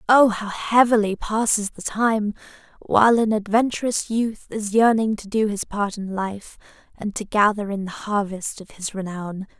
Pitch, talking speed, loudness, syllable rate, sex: 210 Hz, 170 wpm, -21 LUFS, 4.5 syllables/s, female